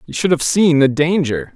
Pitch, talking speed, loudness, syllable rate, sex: 150 Hz, 230 wpm, -15 LUFS, 4.9 syllables/s, male